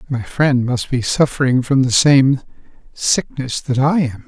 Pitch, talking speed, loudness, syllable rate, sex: 130 Hz, 170 wpm, -16 LUFS, 4.2 syllables/s, male